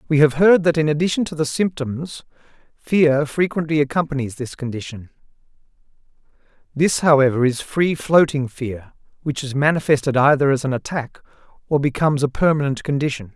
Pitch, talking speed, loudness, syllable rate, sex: 145 Hz, 145 wpm, -19 LUFS, 5.5 syllables/s, male